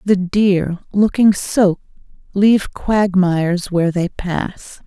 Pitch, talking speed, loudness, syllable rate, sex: 190 Hz, 110 wpm, -16 LUFS, 3.6 syllables/s, female